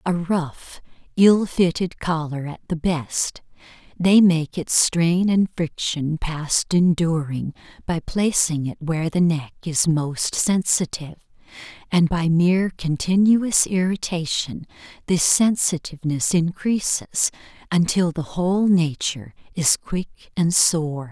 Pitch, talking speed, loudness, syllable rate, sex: 170 Hz, 115 wpm, -21 LUFS, 3.8 syllables/s, female